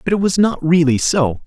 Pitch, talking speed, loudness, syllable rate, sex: 165 Hz, 245 wpm, -15 LUFS, 5.2 syllables/s, male